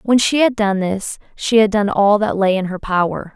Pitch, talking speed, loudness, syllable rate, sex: 205 Hz, 250 wpm, -16 LUFS, 4.8 syllables/s, female